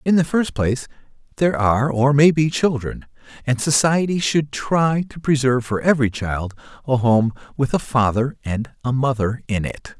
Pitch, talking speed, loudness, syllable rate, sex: 135 Hz, 175 wpm, -19 LUFS, 5.0 syllables/s, male